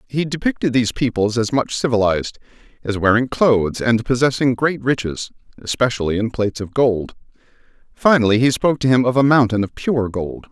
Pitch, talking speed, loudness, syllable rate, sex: 120 Hz, 170 wpm, -18 LUFS, 5.6 syllables/s, male